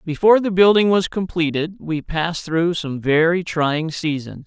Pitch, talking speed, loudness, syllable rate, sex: 170 Hz, 160 wpm, -19 LUFS, 4.6 syllables/s, male